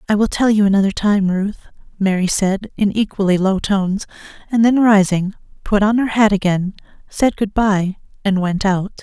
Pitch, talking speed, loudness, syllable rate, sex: 200 Hz, 180 wpm, -17 LUFS, 5.0 syllables/s, female